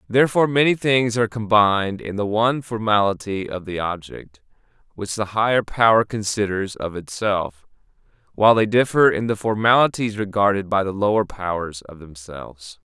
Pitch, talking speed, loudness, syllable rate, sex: 105 Hz, 150 wpm, -20 LUFS, 5.2 syllables/s, male